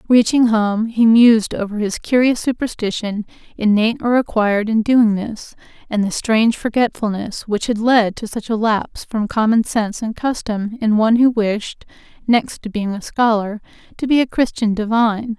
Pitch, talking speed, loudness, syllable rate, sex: 220 Hz, 170 wpm, -17 LUFS, 4.9 syllables/s, female